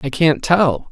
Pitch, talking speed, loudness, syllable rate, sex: 150 Hz, 195 wpm, -16 LUFS, 3.9 syllables/s, male